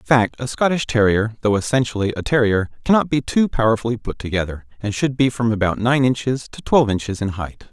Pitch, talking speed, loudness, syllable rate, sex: 115 Hz, 210 wpm, -19 LUFS, 5.9 syllables/s, male